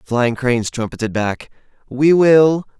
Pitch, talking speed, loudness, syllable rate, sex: 130 Hz, 150 wpm, -16 LUFS, 4.4 syllables/s, male